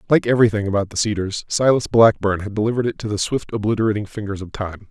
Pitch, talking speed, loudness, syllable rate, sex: 105 Hz, 210 wpm, -19 LUFS, 6.8 syllables/s, male